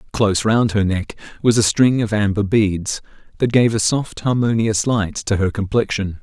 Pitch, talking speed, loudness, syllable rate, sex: 105 Hz, 185 wpm, -18 LUFS, 4.7 syllables/s, male